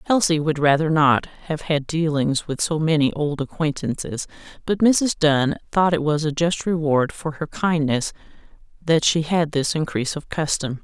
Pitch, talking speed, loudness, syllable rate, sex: 155 Hz, 170 wpm, -21 LUFS, 4.6 syllables/s, female